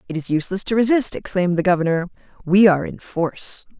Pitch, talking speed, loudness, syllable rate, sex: 185 Hz, 190 wpm, -19 LUFS, 6.6 syllables/s, female